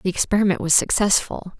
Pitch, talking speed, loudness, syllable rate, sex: 190 Hz, 150 wpm, -19 LUFS, 6.0 syllables/s, female